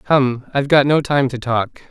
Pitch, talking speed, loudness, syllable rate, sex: 135 Hz, 220 wpm, -17 LUFS, 4.8 syllables/s, male